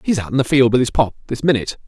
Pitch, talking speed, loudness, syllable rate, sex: 125 Hz, 320 wpm, -17 LUFS, 7.5 syllables/s, male